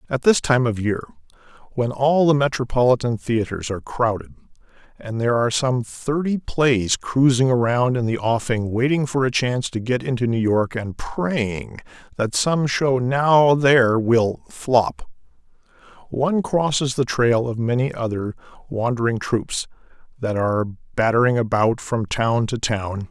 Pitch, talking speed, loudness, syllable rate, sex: 120 Hz, 150 wpm, -20 LUFS, 4.4 syllables/s, male